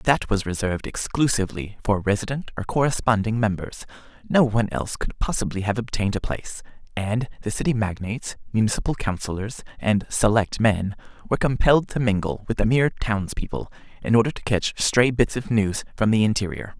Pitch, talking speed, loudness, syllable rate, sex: 110 Hz, 165 wpm, -23 LUFS, 5.8 syllables/s, male